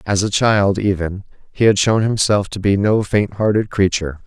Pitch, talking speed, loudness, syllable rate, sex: 100 Hz, 195 wpm, -17 LUFS, 4.9 syllables/s, male